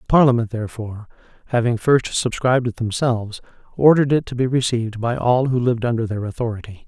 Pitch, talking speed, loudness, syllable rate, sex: 120 Hz, 175 wpm, -19 LUFS, 6.6 syllables/s, male